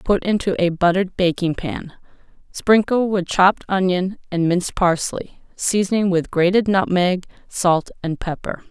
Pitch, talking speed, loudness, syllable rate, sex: 185 Hz, 140 wpm, -19 LUFS, 4.6 syllables/s, female